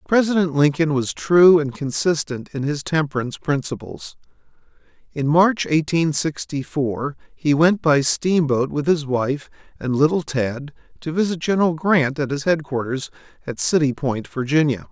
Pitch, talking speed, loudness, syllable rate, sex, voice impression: 150 Hz, 145 wpm, -20 LUFS, 4.6 syllables/s, male, very masculine, very adult-like, very middle-aged, thick, tensed, slightly powerful, bright, hard, clear, fluent, cool, slightly intellectual, sincere, slightly calm, slightly mature, slightly reassuring, slightly unique, wild, lively, slightly strict, slightly intense, slightly light